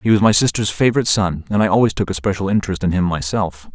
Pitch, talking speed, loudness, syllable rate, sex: 100 Hz, 255 wpm, -17 LUFS, 6.9 syllables/s, male